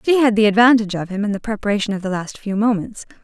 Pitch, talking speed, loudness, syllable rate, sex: 210 Hz, 260 wpm, -18 LUFS, 7.1 syllables/s, female